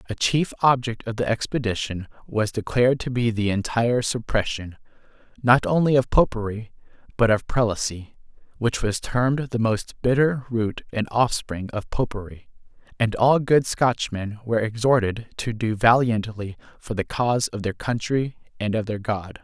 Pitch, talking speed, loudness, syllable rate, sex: 115 Hz, 155 wpm, -23 LUFS, 4.8 syllables/s, male